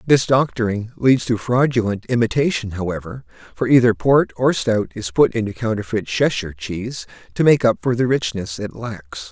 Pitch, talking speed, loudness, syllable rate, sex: 115 Hz, 165 wpm, -19 LUFS, 5.1 syllables/s, male